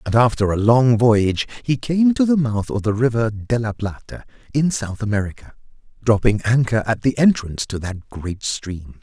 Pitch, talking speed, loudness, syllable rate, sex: 115 Hz, 185 wpm, -19 LUFS, 4.9 syllables/s, male